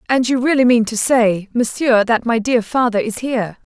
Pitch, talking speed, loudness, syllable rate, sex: 235 Hz, 210 wpm, -16 LUFS, 5.0 syllables/s, female